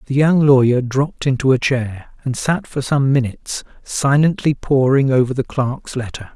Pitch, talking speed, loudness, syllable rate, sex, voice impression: 135 Hz, 170 wpm, -17 LUFS, 4.7 syllables/s, male, masculine, adult-like, tensed, powerful, slightly soft, slightly raspy, intellectual, friendly, lively, slightly sharp